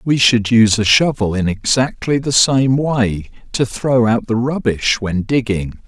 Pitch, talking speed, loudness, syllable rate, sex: 120 Hz, 175 wpm, -15 LUFS, 4.2 syllables/s, male